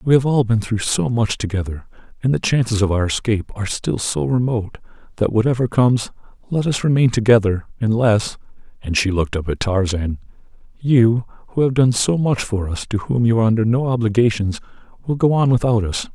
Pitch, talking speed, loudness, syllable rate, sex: 115 Hz, 195 wpm, -18 LUFS, 5.8 syllables/s, male